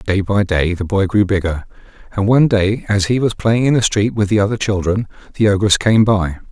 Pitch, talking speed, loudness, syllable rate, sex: 100 Hz, 230 wpm, -15 LUFS, 5.3 syllables/s, male